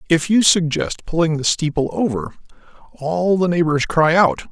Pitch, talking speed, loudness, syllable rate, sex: 160 Hz, 160 wpm, -17 LUFS, 4.7 syllables/s, male